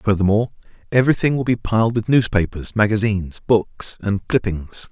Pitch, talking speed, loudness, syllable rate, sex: 105 Hz, 135 wpm, -19 LUFS, 5.6 syllables/s, male